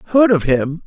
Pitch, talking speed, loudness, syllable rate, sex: 175 Hz, 210 wpm, -15 LUFS, 3.7 syllables/s, male